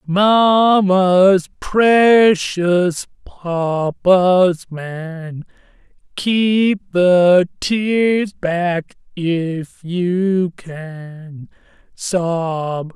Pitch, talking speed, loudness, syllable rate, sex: 180 Hz, 50 wpm, -16 LUFS, 1.5 syllables/s, female